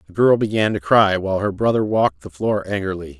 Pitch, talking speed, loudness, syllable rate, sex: 105 Hz, 225 wpm, -19 LUFS, 5.9 syllables/s, male